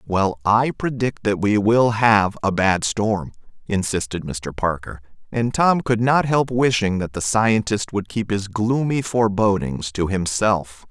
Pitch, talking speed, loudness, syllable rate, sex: 105 Hz, 160 wpm, -20 LUFS, 4.0 syllables/s, male